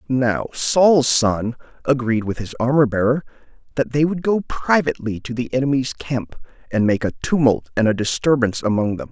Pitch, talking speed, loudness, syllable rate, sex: 125 Hz, 170 wpm, -19 LUFS, 5.2 syllables/s, male